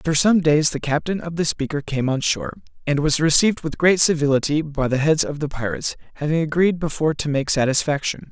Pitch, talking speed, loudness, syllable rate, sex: 150 Hz, 210 wpm, -20 LUFS, 6.1 syllables/s, male